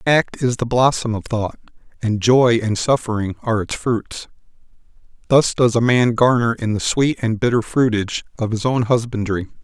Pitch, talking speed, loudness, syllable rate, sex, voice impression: 115 Hz, 175 wpm, -18 LUFS, 4.9 syllables/s, male, masculine, adult-like, tensed, clear, slightly fluent, slightly raspy, cute, sincere, calm, slightly mature, friendly, reassuring, wild, lively, kind